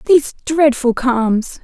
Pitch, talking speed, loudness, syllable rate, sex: 265 Hz, 110 wpm, -15 LUFS, 3.8 syllables/s, female